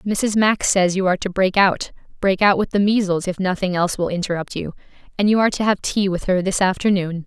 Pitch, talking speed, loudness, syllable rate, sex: 190 Hz, 240 wpm, -19 LUFS, 5.9 syllables/s, female